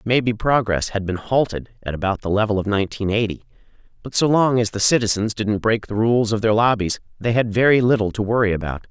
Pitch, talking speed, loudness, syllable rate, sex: 110 Hz, 215 wpm, -19 LUFS, 6.0 syllables/s, male